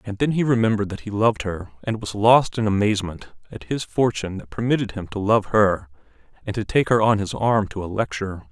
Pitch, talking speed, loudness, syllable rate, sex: 105 Hz, 225 wpm, -21 LUFS, 6.0 syllables/s, male